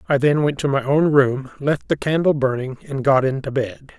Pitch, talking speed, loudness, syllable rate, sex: 140 Hz, 225 wpm, -19 LUFS, 5.0 syllables/s, male